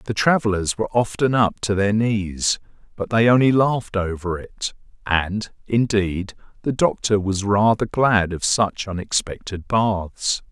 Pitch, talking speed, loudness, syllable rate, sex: 105 Hz, 145 wpm, -20 LUFS, 4.1 syllables/s, male